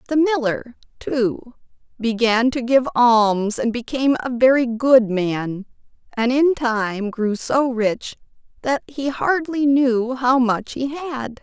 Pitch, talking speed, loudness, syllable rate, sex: 245 Hz, 140 wpm, -19 LUFS, 3.5 syllables/s, female